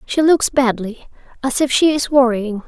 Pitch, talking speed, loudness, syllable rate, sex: 255 Hz, 155 wpm, -16 LUFS, 4.5 syllables/s, female